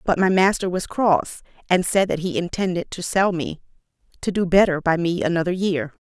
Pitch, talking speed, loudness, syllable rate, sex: 175 Hz, 190 wpm, -21 LUFS, 5.3 syllables/s, female